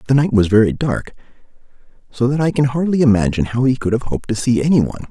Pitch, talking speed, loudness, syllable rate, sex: 120 Hz, 225 wpm, -16 LUFS, 6.9 syllables/s, male